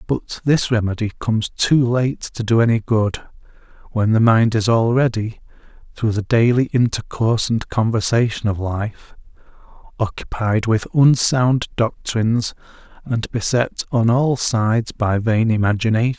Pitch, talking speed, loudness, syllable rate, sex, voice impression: 115 Hz, 130 wpm, -18 LUFS, 4.4 syllables/s, male, very masculine, very adult-like, old, thick, slightly relaxed, slightly weak, slightly dark, very soft, muffled, slightly fluent, slightly raspy, cool, intellectual, slightly refreshing, sincere, very calm, very mature, friendly, reassuring, unique, slightly elegant, wild, slightly sweet, slightly lively, kind, slightly intense, slightly modest